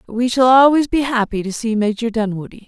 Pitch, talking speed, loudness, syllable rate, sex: 230 Hz, 200 wpm, -16 LUFS, 5.6 syllables/s, female